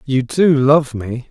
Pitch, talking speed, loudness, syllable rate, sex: 135 Hz, 185 wpm, -14 LUFS, 3.3 syllables/s, male